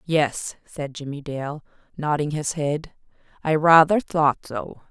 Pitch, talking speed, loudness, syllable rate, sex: 150 Hz, 135 wpm, -22 LUFS, 3.7 syllables/s, female